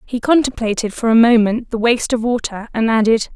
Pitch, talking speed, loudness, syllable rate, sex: 230 Hz, 195 wpm, -16 LUFS, 5.7 syllables/s, female